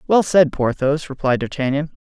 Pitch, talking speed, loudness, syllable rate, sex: 145 Hz, 145 wpm, -18 LUFS, 5.1 syllables/s, male